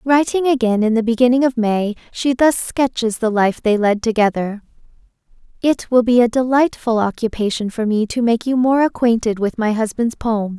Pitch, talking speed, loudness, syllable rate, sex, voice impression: 235 Hz, 180 wpm, -17 LUFS, 5.1 syllables/s, female, feminine, adult-like, tensed, bright, clear, fluent, cute, calm, friendly, reassuring, elegant, slightly sweet, lively, kind